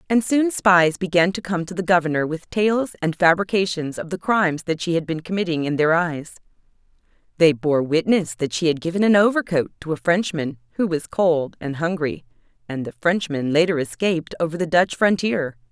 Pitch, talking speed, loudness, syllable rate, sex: 170 Hz, 185 wpm, -20 LUFS, 5.3 syllables/s, female